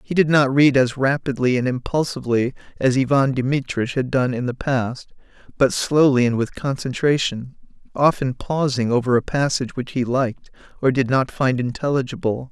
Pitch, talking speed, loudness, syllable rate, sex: 130 Hz, 170 wpm, -20 LUFS, 5.2 syllables/s, male